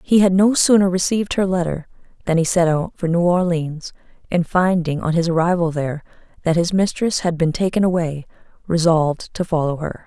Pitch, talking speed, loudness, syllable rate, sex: 170 Hz, 185 wpm, -18 LUFS, 5.5 syllables/s, female